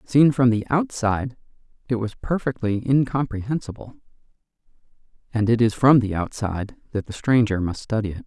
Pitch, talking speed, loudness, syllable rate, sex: 115 Hz, 145 wpm, -22 LUFS, 5.4 syllables/s, male